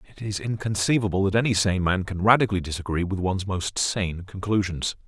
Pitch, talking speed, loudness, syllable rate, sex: 100 Hz, 175 wpm, -24 LUFS, 6.1 syllables/s, male